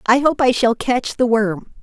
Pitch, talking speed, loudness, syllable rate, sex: 240 Hz, 230 wpm, -17 LUFS, 4.4 syllables/s, female